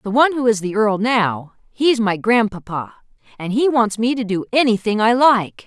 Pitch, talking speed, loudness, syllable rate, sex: 220 Hz, 200 wpm, -17 LUFS, 4.9 syllables/s, female